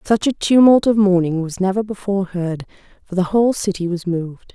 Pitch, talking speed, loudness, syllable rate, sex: 190 Hz, 200 wpm, -17 LUFS, 5.6 syllables/s, female